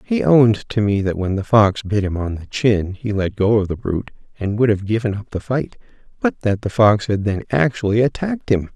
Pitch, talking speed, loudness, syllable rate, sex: 110 Hz, 240 wpm, -18 LUFS, 5.4 syllables/s, male